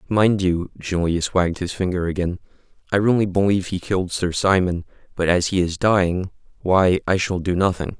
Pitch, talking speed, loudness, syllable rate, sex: 90 Hz, 165 wpm, -20 LUFS, 5.4 syllables/s, male